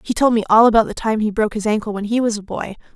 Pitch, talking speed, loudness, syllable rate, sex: 215 Hz, 325 wpm, -17 LUFS, 7.2 syllables/s, female